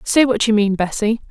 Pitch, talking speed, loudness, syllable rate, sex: 220 Hz, 230 wpm, -17 LUFS, 5.3 syllables/s, female